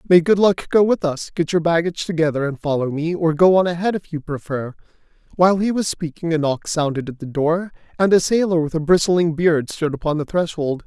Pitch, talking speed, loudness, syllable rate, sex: 165 Hz, 225 wpm, -19 LUFS, 5.7 syllables/s, male